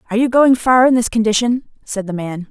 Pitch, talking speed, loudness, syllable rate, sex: 230 Hz, 240 wpm, -15 LUFS, 6.1 syllables/s, female